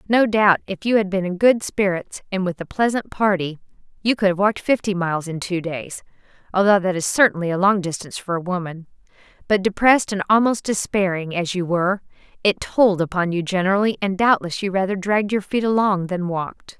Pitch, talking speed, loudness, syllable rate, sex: 190 Hz, 200 wpm, -20 LUFS, 5.8 syllables/s, female